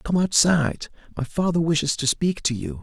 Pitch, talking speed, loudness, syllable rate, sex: 150 Hz, 190 wpm, -22 LUFS, 5.3 syllables/s, male